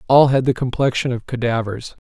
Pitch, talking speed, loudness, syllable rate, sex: 125 Hz, 175 wpm, -19 LUFS, 5.5 syllables/s, male